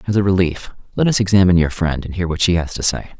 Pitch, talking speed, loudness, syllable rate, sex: 90 Hz, 280 wpm, -17 LUFS, 6.9 syllables/s, male